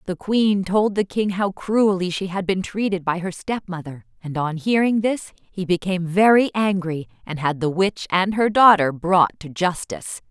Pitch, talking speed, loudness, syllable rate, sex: 190 Hz, 185 wpm, -20 LUFS, 4.7 syllables/s, female